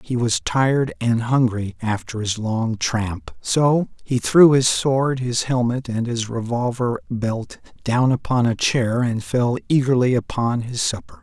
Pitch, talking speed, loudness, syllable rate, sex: 120 Hz, 165 wpm, -20 LUFS, 4.0 syllables/s, male